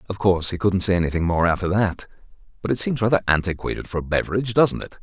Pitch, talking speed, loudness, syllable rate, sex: 95 Hz, 225 wpm, -21 LUFS, 7.1 syllables/s, male